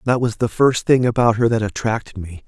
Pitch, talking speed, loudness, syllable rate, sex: 115 Hz, 240 wpm, -18 LUFS, 5.6 syllables/s, male